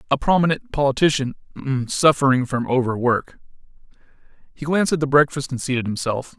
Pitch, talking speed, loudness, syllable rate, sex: 135 Hz, 120 wpm, -20 LUFS, 6.2 syllables/s, male